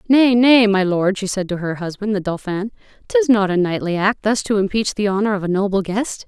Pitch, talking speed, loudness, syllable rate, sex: 200 Hz, 250 wpm, -18 LUFS, 5.6 syllables/s, female